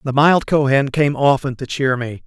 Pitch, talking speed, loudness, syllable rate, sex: 135 Hz, 210 wpm, -17 LUFS, 4.6 syllables/s, male